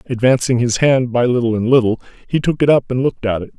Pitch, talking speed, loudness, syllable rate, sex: 125 Hz, 250 wpm, -16 LUFS, 6.3 syllables/s, male